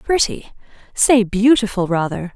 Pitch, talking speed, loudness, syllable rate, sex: 215 Hz, 100 wpm, -16 LUFS, 4.3 syllables/s, female